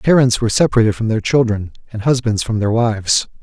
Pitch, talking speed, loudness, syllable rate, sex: 115 Hz, 195 wpm, -16 LUFS, 6.2 syllables/s, male